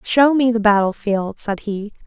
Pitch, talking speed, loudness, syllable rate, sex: 220 Hz, 205 wpm, -18 LUFS, 4.3 syllables/s, female